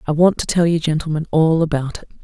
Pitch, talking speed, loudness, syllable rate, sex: 160 Hz, 240 wpm, -17 LUFS, 6.3 syllables/s, female